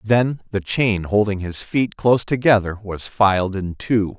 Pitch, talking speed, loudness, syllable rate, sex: 105 Hz, 170 wpm, -20 LUFS, 4.3 syllables/s, male